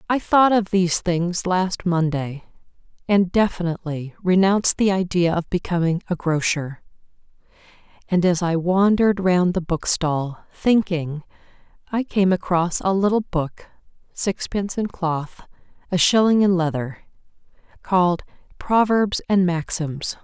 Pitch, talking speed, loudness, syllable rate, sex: 180 Hz, 120 wpm, -20 LUFS, 4.4 syllables/s, female